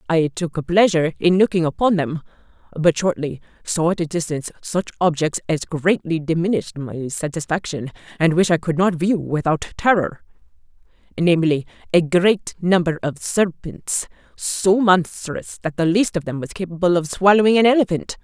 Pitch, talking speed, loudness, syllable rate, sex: 170 Hz, 155 wpm, -19 LUFS, 5.0 syllables/s, female